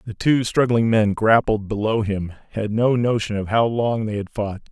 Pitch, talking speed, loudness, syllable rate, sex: 110 Hz, 205 wpm, -20 LUFS, 4.7 syllables/s, male